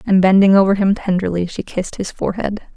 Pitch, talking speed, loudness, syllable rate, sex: 190 Hz, 195 wpm, -16 LUFS, 6.4 syllables/s, female